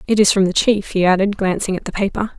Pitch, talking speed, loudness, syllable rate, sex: 195 Hz, 275 wpm, -17 LUFS, 6.3 syllables/s, female